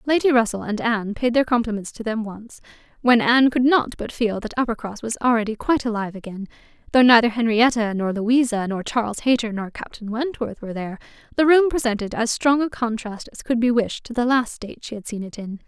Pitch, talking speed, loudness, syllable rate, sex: 230 Hz, 215 wpm, -21 LUFS, 5.9 syllables/s, female